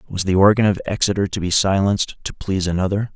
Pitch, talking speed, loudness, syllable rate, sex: 95 Hz, 210 wpm, -19 LUFS, 6.7 syllables/s, male